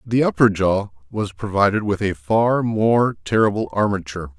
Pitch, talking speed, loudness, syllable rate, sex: 100 Hz, 150 wpm, -19 LUFS, 4.7 syllables/s, male